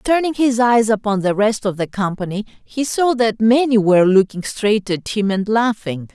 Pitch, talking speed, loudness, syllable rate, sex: 215 Hz, 195 wpm, -17 LUFS, 4.8 syllables/s, female